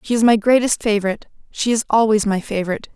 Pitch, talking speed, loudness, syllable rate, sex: 215 Hz, 205 wpm, -17 LUFS, 7.0 syllables/s, female